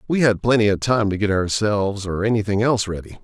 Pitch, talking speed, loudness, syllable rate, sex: 105 Hz, 225 wpm, -20 LUFS, 6.2 syllables/s, male